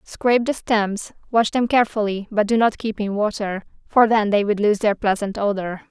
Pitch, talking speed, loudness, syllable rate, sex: 215 Hz, 205 wpm, -20 LUFS, 5.1 syllables/s, female